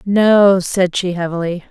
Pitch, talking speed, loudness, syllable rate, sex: 185 Hz, 140 wpm, -14 LUFS, 3.8 syllables/s, female